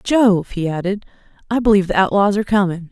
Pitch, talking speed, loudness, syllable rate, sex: 195 Hz, 185 wpm, -17 LUFS, 6.3 syllables/s, female